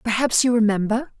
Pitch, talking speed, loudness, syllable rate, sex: 230 Hz, 150 wpm, -19 LUFS, 5.7 syllables/s, female